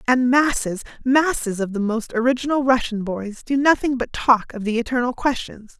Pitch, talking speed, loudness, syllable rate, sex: 245 Hz, 175 wpm, -20 LUFS, 5.1 syllables/s, female